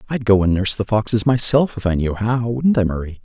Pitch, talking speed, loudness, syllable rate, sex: 110 Hz, 260 wpm, -18 LUFS, 5.9 syllables/s, male